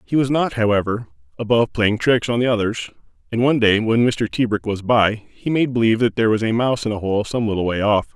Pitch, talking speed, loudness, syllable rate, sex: 115 Hz, 245 wpm, -19 LUFS, 6.3 syllables/s, male